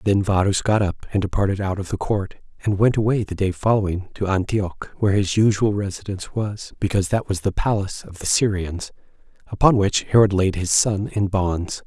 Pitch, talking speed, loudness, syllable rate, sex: 100 Hz, 195 wpm, -21 LUFS, 5.5 syllables/s, male